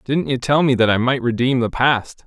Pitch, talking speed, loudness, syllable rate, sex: 125 Hz, 265 wpm, -18 LUFS, 5.1 syllables/s, male